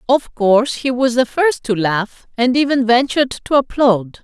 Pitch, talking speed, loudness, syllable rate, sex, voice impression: 245 Hz, 185 wpm, -16 LUFS, 4.6 syllables/s, female, slightly masculine, feminine, very gender-neutral, adult-like, middle-aged, slightly thin, tensed, powerful, very bright, hard, clear, fluent, slightly raspy, slightly cool, slightly intellectual, slightly mature, very unique, very wild, very lively, strict, intense, sharp